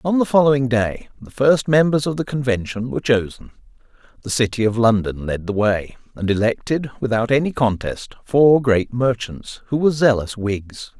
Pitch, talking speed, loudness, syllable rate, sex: 120 Hz, 170 wpm, -19 LUFS, 5.0 syllables/s, male